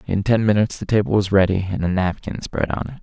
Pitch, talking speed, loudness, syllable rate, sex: 100 Hz, 260 wpm, -20 LUFS, 6.4 syllables/s, male